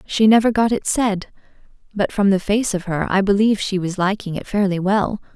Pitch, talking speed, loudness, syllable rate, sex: 200 Hz, 215 wpm, -19 LUFS, 5.3 syllables/s, female